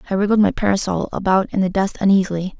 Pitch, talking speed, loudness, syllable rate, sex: 195 Hz, 210 wpm, -18 LUFS, 6.9 syllables/s, female